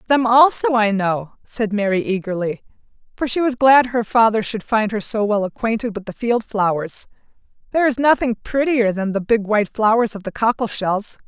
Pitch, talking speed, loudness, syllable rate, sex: 220 Hz, 190 wpm, -18 LUFS, 5.1 syllables/s, female